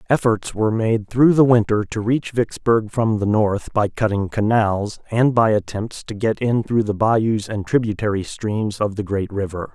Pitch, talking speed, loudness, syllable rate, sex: 110 Hz, 190 wpm, -19 LUFS, 4.5 syllables/s, male